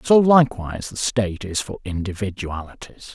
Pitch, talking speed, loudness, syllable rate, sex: 105 Hz, 135 wpm, -21 LUFS, 5.4 syllables/s, male